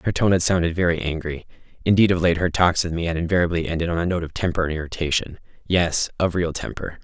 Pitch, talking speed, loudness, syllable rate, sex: 85 Hz, 220 wpm, -22 LUFS, 6.5 syllables/s, male